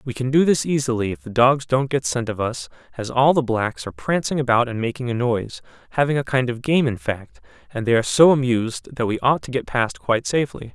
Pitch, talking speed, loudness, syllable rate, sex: 125 Hz, 245 wpm, -20 LUFS, 6.0 syllables/s, male